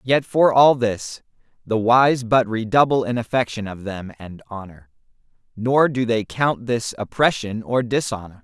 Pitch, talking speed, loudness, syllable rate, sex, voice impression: 115 Hz, 155 wpm, -19 LUFS, 4.3 syllables/s, male, masculine, slightly young, adult-like, slightly thick, slightly relaxed, slightly powerful, bright, slightly soft, clear, fluent, cool, slightly intellectual, very refreshing, sincere, calm, very friendly, reassuring, slightly unique, elegant, slightly wild, sweet, lively, very kind, slightly modest, slightly light